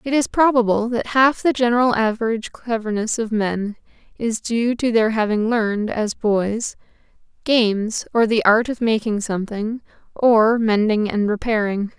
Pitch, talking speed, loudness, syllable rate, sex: 225 Hz, 150 wpm, -19 LUFS, 4.7 syllables/s, female